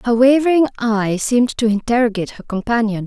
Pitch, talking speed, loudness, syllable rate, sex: 230 Hz, 155 wpm, -16 LUFS, 6.1 syllables/s, female